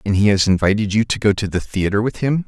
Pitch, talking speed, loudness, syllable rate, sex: 105 Hz, 290 wpm, -18 LUFS, 6.3 syllables/s, male